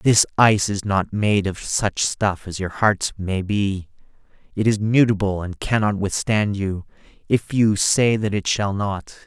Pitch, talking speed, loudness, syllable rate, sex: 100 Hz, 175 wpm, -20 LUFS, 4.0 syllables/s, male